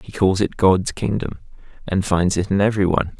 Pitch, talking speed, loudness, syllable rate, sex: 95 Hz, 205 wpm, -19 LUFS, 5.7 syllables/s, male